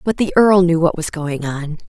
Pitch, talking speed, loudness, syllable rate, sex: 170 Hz, 250 wpm, -16 LUFS, 4.8 syllables/s, female